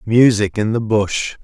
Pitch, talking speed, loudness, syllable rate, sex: 110 Hz, 165 wpm, -16 LUFS, 3.8 syllables/s, male